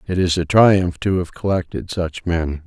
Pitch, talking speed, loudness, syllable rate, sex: 90 Hz, 200 wpm, -19 LUFS, 4.4 syllables/s, male